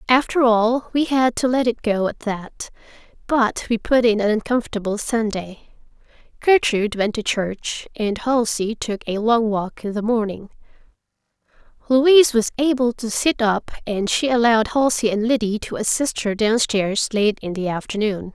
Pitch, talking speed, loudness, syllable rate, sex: 225 Hz, 165 wpm, -20 LUFS, 4.6 syllables/s, female